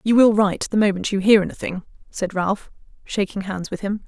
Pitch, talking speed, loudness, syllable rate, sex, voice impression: 200 Hz, 205 wpm, -21 LUFS, 5.6 syllables/s, female, feminine, adult-like, tensed, powerful, hard, clear, intellectual, calm, elegant, lively, strict, sharp